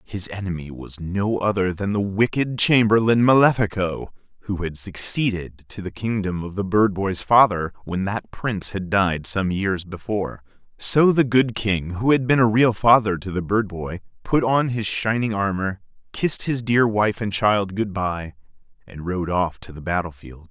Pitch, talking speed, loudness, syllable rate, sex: 100 Hz, 180 wpm, -21 LUFS, 4.6 syllables/s, male